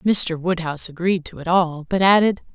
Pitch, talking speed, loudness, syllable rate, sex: 175 Hz, 190 wpm, -19 LUFS, 5.0 syllables/s, female